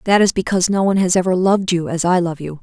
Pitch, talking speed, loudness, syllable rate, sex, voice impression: 180 Hz, 300 wpm, -16 LUFS, 7.2 syllables/s, female, feminine, adult-like, slightly clear, slightly cute, slightly refreshing, slightly friendly